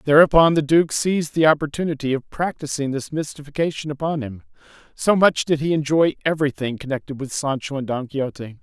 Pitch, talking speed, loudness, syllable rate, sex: 145 Hz, 165 wpm, -21 LUFS, 5.9 syllables/s, male